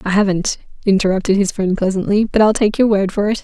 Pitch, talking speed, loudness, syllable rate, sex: 200 Hz, 225 wpm, -16 LUFS, 6.2 syllables/s, female